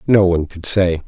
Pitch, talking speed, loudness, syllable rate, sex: 90 Hz, 225 wpm, -16 LUFS, 5.6 syllables/s, male